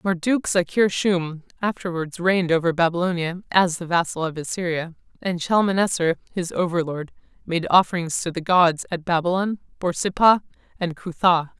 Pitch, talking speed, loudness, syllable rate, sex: 175 Hz, 135 wpm, -22 LUFS, 5.1 syllables/s, female